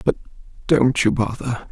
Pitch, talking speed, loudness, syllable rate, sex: 125 Hz, 140 wpm, -20 LUFS, 4.5 syllables/s, male